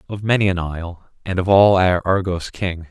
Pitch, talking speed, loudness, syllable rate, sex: 90 Hz, 185 wpm, -18 LUFS, 4.7 syllables/s, male